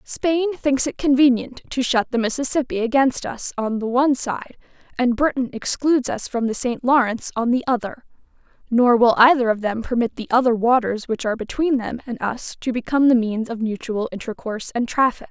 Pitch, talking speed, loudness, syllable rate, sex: 245 Hz, 190 wpm, -20 LUFS, 5.5 syllables/s, female